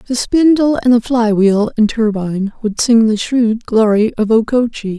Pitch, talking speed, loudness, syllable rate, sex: 225 Hz, 170 wpm, -13 LUFS, 4.5 syllables/s, female